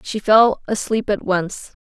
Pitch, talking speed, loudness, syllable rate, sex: 205 Hz, 165 wpm, -18 LUFS, 3.7 syllables/s, female